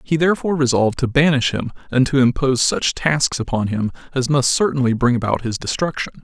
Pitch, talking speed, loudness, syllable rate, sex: 135 Hz, 190 wpm, -18 LUFS, 6.0 syllables/s, male